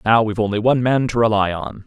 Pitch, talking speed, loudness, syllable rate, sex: 110 Hz, 260 wpm, -18 LUFS, 6.3 syllables/s, male